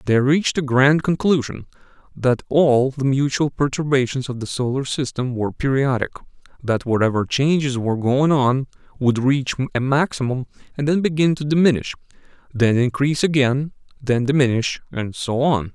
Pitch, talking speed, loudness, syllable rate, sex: 135 Hz, 140 wpm, -19 LUFS, 5.1 syllables/s, male